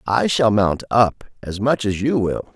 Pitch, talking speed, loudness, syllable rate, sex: 110 Hz, 210 wpm, -19 LUFS, 4.0 syllables/s, male